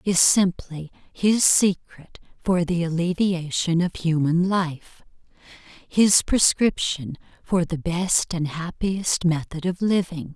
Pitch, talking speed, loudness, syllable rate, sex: 175 Hz, 115 wpm, -22 LUFS, 3.5 syllables/s, female